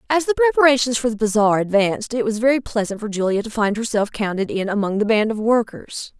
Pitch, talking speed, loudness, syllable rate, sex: 225 Hz, 225 wpm, -19 LUFS, 6.3 syllables/s, female